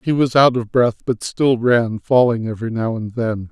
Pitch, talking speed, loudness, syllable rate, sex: 120 Hz, 220 wpm, -17 LUFS, 4.8 syllables/s, male